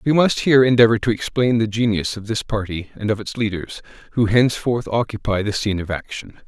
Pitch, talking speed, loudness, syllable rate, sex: 110 Hz, 205 wpm, -19 LUFS, 6.0 syllables/s, male